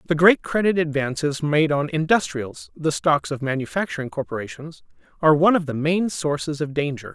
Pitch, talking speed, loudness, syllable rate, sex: 150 Hz, 170 wpm, -21 LUFS, 5.5 syllables/s, male